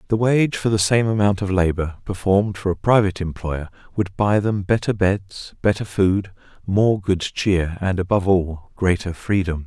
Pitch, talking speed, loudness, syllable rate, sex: 95 Hz, 175 wpm, -20 LUFS, 4.7 syllables/s, male